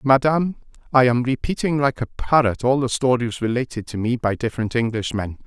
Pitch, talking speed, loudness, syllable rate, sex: 125 Hz, 175 wpm, -21 LUFS, 5.7 syllables/s, male